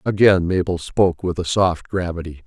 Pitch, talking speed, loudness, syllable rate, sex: 90 Hz, 170 wpm, -19 LUFS, 5.1 syllables/s, male